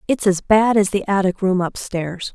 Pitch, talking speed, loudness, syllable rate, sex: 195 Hz, 230 wpm, -18 LUFS, 4.6 syllables/s, female